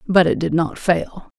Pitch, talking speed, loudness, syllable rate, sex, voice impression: 175 Hz, 215 wpm, -19 LUFS, 4.3 syllables/s, female, very feminine, very middle-aged, slightly thin, tensed, slightly powerful, slightly bright, slightly soft, clear, very fluent, slightly raspy, cool, very intellectual, refreshing, sincere, calm, very friendly, reassuring, unique, elegant, slightly wild, sweet, lively, strict, slightly intense, slightly sharp, slightly light